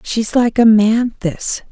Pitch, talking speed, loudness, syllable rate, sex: 215 Hz, 105 wpm, -14 LUFS, 3.2 syllables/s, female